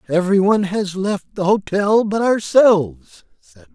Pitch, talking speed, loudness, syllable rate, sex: 195 Hz, 145 wpm, -17 LUFS, 4.6 syllables/s, male